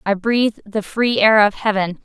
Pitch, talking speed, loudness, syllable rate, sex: 210 Hz, 205 wpm, -17 LUFS, 4.8 syllables/s, female